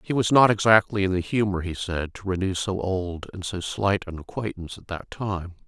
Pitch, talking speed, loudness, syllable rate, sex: 95 Hz, 220 wpm, -24 LUFS, 5.1 syllables/s, male